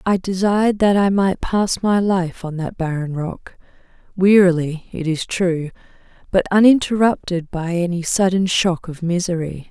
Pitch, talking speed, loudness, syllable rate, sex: 180 Hz, 150 wpm, -18 LUFS, 4.4 syllables/s, female